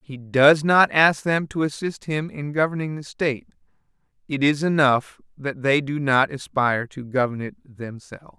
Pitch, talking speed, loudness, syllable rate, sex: 140 Hz, 170 wpm, -21 LUFS, 4.7 syllables/s, male